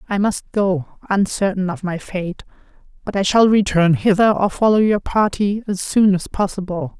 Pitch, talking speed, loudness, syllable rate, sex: 195 Hz, 170 wpm, -18 LUFS, 4.7 syllables/s, female